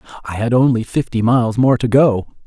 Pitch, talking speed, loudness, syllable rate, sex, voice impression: 120 Hz, 195 wpm, -15 LUFS, 5.8 syllables/s, male, very masculine, adult-like, thick, tensed, slightly weak, bright, slightly soft, clear, fluent, cool, intellectual, very refreshing, sincere, slightly calm, mature, friendly, reassuring, unique, elegant, wild, sweet, lively, strict, slightly intense, slightly sharp